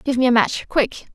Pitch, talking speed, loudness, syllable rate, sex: 250 Hz, 265 wpm, -19 LUFS, 5.2 syllables/s, female